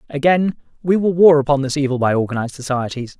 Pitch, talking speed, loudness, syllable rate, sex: 145 Hz, 190 wpm, -17 LUFS, 6.5 syllables/s, male